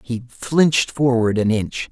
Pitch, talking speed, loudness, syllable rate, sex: 120 Hz, 155 wpm, -18 LUFS, 4.0 syllables/s, male